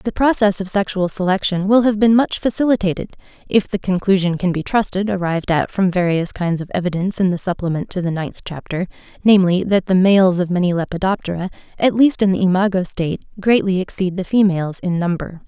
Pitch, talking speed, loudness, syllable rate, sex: 190 Hz, 190 wpm, -18 LUFS, 5.9 syllables/s, female